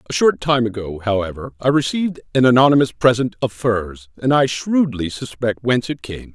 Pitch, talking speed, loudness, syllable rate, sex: 120 Hz, 180 wpm, -18 LUFS, 5.3 syllables/s, male